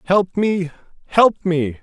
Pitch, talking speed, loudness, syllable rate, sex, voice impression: 175 Hz, 130 wpm, -18 LUFS, 3.4 syllables/s, male, masculine, middle-aged, thick, tensed, powerful, slightly soft, clear, cool, intellectual, mature, reassuring, wild, lively, slightly kind